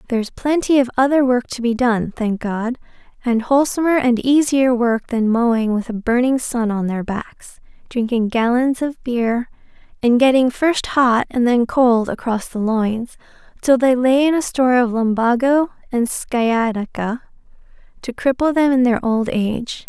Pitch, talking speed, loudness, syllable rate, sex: 245 Hz, 170 wpm, -17 LUFS, 4.6 syllables/s, female